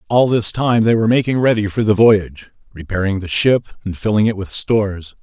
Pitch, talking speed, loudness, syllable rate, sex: 105 Hz, 205 wpm, -16 LUFS, 5.7 syllables/s, male